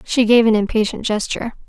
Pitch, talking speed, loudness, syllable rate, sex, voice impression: 220 Hz, 180 wpm, -17 LUFS, 6.0 syllables/s, female, very feminine, young, thin, slightly tensed, powerful, slightly dark, slightly soft, slightly muffled, fluent, slightly raspy, cute, slightly cool, intellectual, sincere, calm, very friendly, very reassuring, unique, elegant, slightly wild, very sweet, lively, kind, slightly intense, slightly modest, light